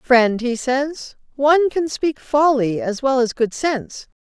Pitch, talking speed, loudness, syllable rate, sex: 265 Hz, 170 wpm, -19 LUFS, 3.9 syllables/s, female